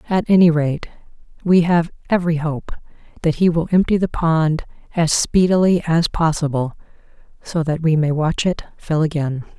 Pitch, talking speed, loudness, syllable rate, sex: 165 Hz, 155 wpm, -18 LUFS, 4.8 syllables/s, female